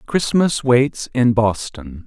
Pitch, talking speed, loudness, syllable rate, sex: 120 Hz, 115 wpm, -17 LUFS, 3.2 syllables/s, male